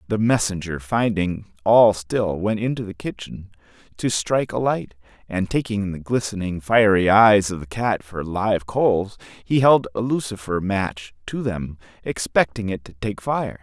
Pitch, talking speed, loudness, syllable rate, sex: 100 Hz, 165 wpm, -21 LUFS, 4.4 syllables/s, male